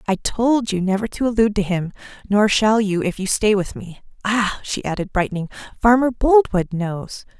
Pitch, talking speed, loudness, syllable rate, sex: 205 Hz, 185 wpm, -19 LUFS, 5.1 syllables/s, female